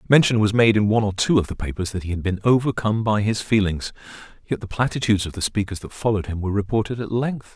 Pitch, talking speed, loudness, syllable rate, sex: 105 Hz, 245 wpm, -21 LUFS, 6.9 syllables/s, male